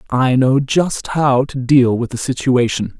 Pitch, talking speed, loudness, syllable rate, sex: 130 Hz, 180 wpm, -15 LUFS, 3.9 syllables/s, male